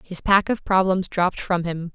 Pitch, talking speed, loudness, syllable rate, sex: 185 Hz, 215 wpm, -21 LUFS, 4.9 syllables/s, female